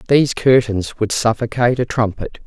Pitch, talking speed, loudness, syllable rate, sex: 115 Hz, 145 wpm, -17 LUFS, 5.4 syllables/s, female